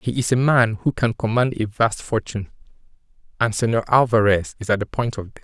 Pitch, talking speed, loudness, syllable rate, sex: 115 Hz, 200 wpm, -20 LUFS, 5.6 syllables/s, male